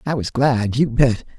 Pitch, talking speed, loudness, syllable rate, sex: 125 Hz, 215 wpm, -18 LUFS, 4.3 syllables/s, male